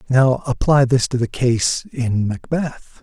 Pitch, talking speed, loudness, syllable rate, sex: 125 Hz, 160 wpm, -18 LUFS, 3.6 syllables/s, male